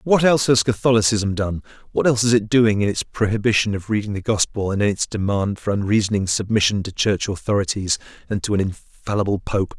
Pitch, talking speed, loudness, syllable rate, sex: 105 Hz, 195 wpm, -20 LUFS, 5.9 syllables/s, male